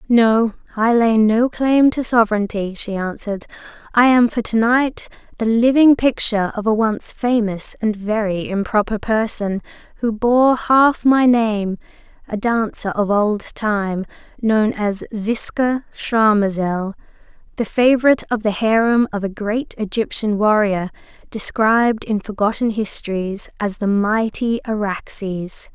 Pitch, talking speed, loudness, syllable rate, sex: 220 Hz, 135 wpm, -18 LUFS, 4.1 syllables/s, female